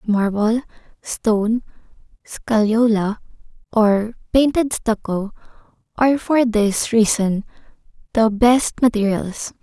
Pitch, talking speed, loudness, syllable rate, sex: 225 Hz, 80 wpm, -18 LUFS, 3.6 syllables/s, female